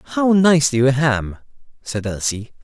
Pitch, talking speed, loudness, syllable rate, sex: 135 Hz, 135 wpm, -17 LUFS, 4.3 syllables/s, male